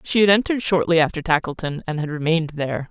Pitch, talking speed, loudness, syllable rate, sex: 160 Hz, 205 wpm, -20 LUFS, 6.8 syllables/s, female